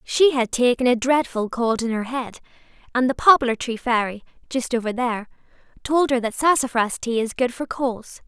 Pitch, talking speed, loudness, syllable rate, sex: 245 Hz, 190 wpm, -21 LUFS, 5.0 syllables/s, female